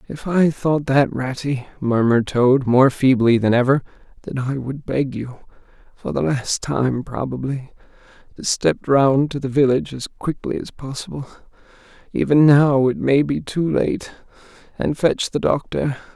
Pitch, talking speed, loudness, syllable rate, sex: 130 Hz, 140 wpm, -19 LUFS, 4.5 syllables/s, male